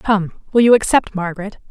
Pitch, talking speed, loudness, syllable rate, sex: 200 Hz, 175 wpm, -16 LUFS, 5.7 syllables/s, female